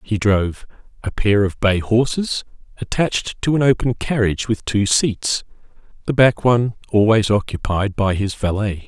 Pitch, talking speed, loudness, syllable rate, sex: 110 Hz, 155 wpm, -18 LUFS, 4.8 syllables/s, male